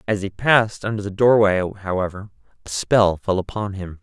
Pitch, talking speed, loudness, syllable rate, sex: 100 Hz, 180 wpm, -20 LUFS, 5.1 syllables/s, male